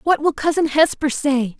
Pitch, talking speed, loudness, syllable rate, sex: 290 Hz, 190 wpm, -18 LUFS, 4.7 syllables/s, female